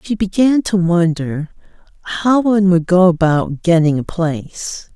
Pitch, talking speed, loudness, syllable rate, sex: 180 Hz, 145 wpm, -15 LUFS, 4.4 syllables/s, female